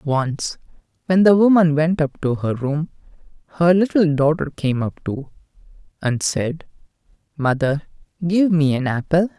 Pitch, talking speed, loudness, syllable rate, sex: 155 Hz, 140 wpm, -19 LUFS, 4.3 syllables/s, male